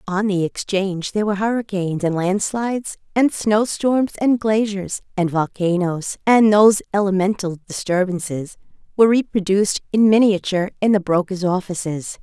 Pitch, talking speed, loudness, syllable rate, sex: 200 Hz, 130 wpm, -19 LUFS, 5.2 syllables/s, female